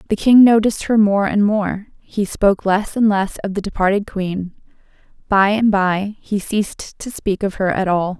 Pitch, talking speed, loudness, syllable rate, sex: 200 Hz, 190 wpm, -17 LUFS, 4.7 syllables/s, female